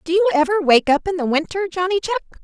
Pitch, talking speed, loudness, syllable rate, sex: 340 Hz, 245 wpm, -18 LUFS, 6.6 syllables/s, female